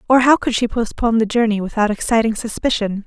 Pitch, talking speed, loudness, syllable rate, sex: 225 Hz, 195 wpm, -17 LUFS, 6.2 syllables/s, female